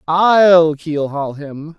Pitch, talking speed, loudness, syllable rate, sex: 160 Hz, 135 wpm, -14 LUFS, 2.5 syllables/s, male